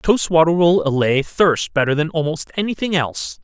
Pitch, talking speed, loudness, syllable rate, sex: 160 Hz, 190 wpm, -17 LUFS, 5.0 syllables/s, male